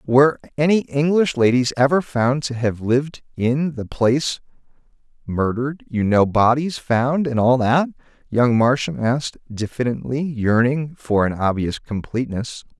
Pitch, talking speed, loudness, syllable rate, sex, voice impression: 130 Hz, 125 wpm, -19 LUFS, 4.6 syllables/s, male, masculine, adult-like, tensed, slightly powerful, clear, fluent, cool, intellectual, sincere, wild, lively, slightly strict